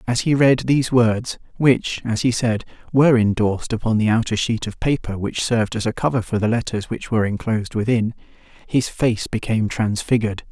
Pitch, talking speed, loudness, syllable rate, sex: 115 Hz, 190 wpm, -20 LUFS, 5.6 syllables/s, male